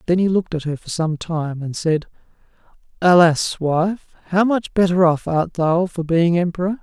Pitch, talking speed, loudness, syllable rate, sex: 170 Hz, 185 wpm, -19 LUFS, 4.7 syllables/s, male